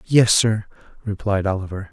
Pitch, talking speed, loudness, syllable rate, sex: 105 Hz, 125 wpm, -20 LUFS, 4.8 syllables/s, male